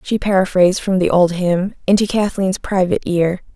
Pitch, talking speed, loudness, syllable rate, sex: 185 Hz, 170 wpm, -16 LUFS, 5.4 syllables/s, female